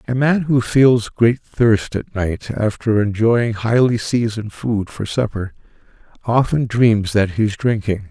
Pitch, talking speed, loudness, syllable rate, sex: 110 Hz, 155 wpm, -17 LUFS, 4.0 syllables/s, male